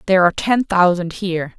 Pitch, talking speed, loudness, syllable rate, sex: 185 Hz, 190 wpm, -17 LUFS, 6.4 syllables/s, female